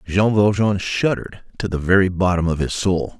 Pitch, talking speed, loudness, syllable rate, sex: 95 Hz, 190 wpm, -19 LUFS, 5.1 syllables/s, male